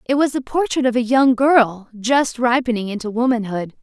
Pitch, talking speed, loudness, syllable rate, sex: 245 Hz, 190 wpm, -18 LUFS, 5.0 syllables/s, female